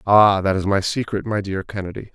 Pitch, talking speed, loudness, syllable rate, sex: 100 Hz, 225 wpm, -20 LUFS, 5.5 syllables/s, male